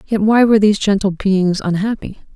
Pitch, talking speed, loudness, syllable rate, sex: 200 Hz, 180 wpm, -15 LUFS, 5.6 syllables/s, female